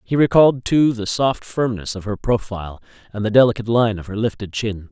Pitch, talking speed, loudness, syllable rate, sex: 110 Hz, 210 wpm, -19 LUFS, 5.8 syllables/s, male